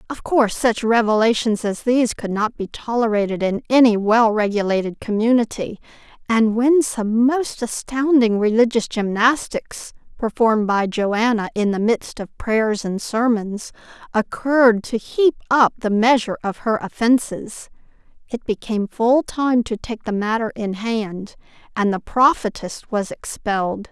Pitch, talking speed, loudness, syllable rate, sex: 225 Hz, 140 wpm, -19 LUFS, 4.5 syllables/s, female